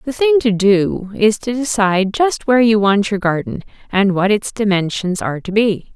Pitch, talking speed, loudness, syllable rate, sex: 210 Hz, 200 wpm, -16 LUFS, 5.0 syllables/s, female